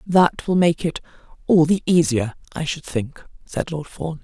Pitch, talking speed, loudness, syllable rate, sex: 160 Hz, 185 wpm, -20 LUFS, 4.3 syllables/s, female